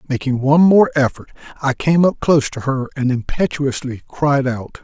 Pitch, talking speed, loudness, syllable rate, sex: 140 Hz, 175 wpm, -17 LUFS, 5.0 syllables/s, male